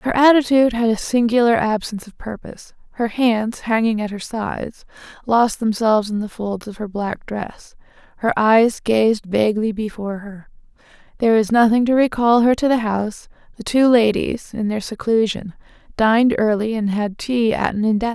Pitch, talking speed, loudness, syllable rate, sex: 220 Hz, 175 wpm, -18 LUFS, 5.3 syllables/s, female